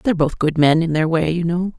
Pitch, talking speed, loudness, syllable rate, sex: 165 Hz, 300 wpm, -18 LUFS, 6.0 syllables/s, female